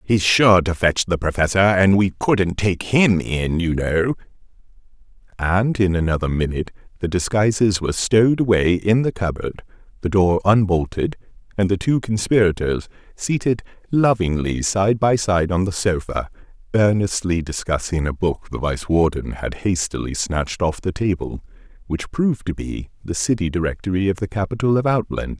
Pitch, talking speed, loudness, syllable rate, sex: 95 Hz, 155 wpm, -20 LUFS, 4.9 syllables/s, male